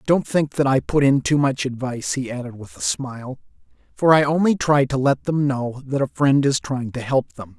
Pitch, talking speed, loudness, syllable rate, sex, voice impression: 135 Hz, 235 wpm, -20 LUFS, 5.1 syllables/s, male, masculine, adult-like, tensed, powerful, bright, slightly muffled, slightly raspy, intellectual, friendly, reassuring, wild, lively, kind, slightly light